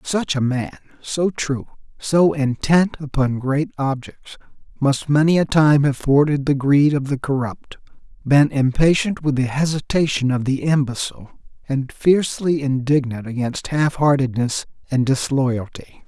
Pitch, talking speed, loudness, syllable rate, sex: 140 Hz, 140 wpm, -19 LUFS, 4.4 syllables/s, male